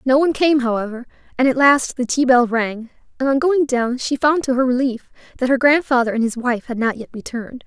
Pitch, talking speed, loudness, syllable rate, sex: 255 Hz, 235 wpm, -18 LUFS, 5.7 syllables/s, female